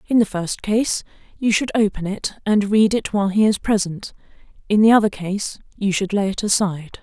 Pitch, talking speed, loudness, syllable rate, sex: 205 Hz, 205 wpm, -19 LUFS, 5.4 syllables/s, female